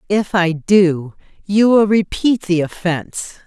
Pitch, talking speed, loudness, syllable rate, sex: 190 Hz, 140 wpm, -16 LUFS, 3.8 syllables/s, female